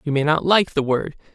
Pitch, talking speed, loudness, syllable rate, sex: 155 Hz, 265 wpm, -19 LUFS, 5.5 syllables/s, male